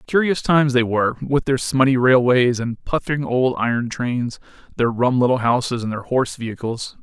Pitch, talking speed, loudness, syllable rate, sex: 125 Hz, 180 wpm, -19 LUFS, 5.2 syllables/s, male